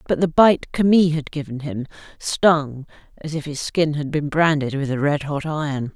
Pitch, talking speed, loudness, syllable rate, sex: 150 Hz, 200 wpm, -20 LUFS, 4.9 syllables/s, female